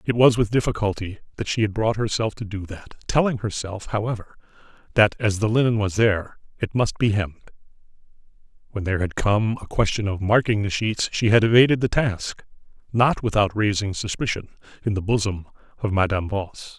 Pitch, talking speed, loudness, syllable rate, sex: 105 Hz, 170 wpm, -22 LUFS, 5.7 syllables/s, male